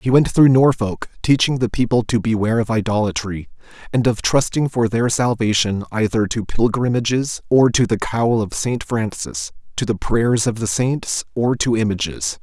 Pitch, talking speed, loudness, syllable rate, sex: 115 Hz, 175 wpm, -18 LUFS, 4.8 syllables/s, male